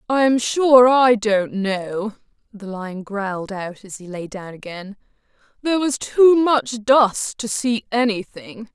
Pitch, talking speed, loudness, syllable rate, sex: 220 Hz, 150 wpm, -18 LUFS, 3.6 syllables/s, female